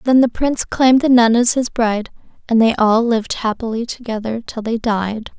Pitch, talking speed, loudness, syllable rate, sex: 230 Hz, 200 wpm, -16 LUFS, 5.4 syllables/s, female